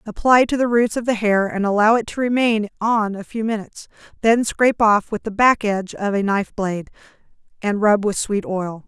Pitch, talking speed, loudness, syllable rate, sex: 215 Hz, 215 wpm, -19 LUFS, 5.4 syllables/s, female